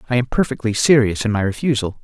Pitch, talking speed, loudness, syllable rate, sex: 115 Hz, 205 wpm, -18 LUFS, 6.6 syllables/s, male